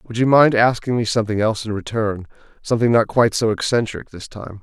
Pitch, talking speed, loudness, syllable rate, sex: 110 Hz, 195 wpm, -18 LUFS, 6.1 syllables/s, male